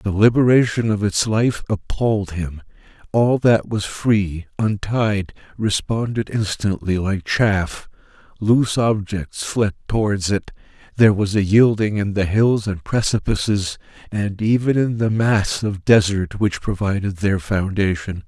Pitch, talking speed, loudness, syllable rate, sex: 105 Hz, 135 wpm, -19 LUFS, 4.1 syllables/s, male